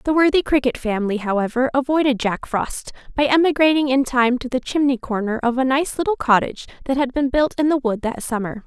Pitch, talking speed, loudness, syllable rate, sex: 260 Hz, 210 wpm, -19 LUFS, 5.8 syllables/s, female